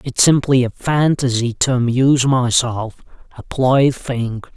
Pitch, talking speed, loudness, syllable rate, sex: 130 Hz, 120 wpm, -16 LUFS, 4.0 syllables/s, male